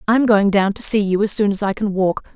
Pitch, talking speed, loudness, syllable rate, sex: 205 Hz, 305 wpm, -17 LUFS, 5.8 syllables/s, female